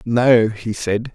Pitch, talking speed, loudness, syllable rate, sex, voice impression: 115 Hz, 155 wpm, -17 LUFS, 2.9 syllables/s, male, masculine, adult-like, slightly fluent, intellectual, slightly refreshing, friendly